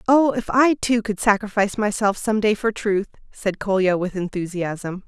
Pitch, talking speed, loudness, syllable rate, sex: 205 Hz, 175 wpm, -21 LUFS, 4.8 syllables/s, female